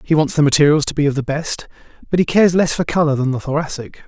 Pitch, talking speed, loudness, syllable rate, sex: 150 Hz, 265 wpm, -16 LUFS, 6.8 syllables/s, male